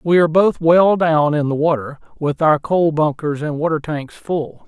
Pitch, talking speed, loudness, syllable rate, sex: 155 Hz, 205 wpm, -17 LUFS, 4.6 syllables/s, male